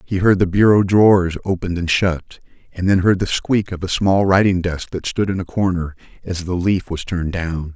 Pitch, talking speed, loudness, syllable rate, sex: 90 Hz, 225 wpm, -18 LUFS, 5.3 syllables/s, male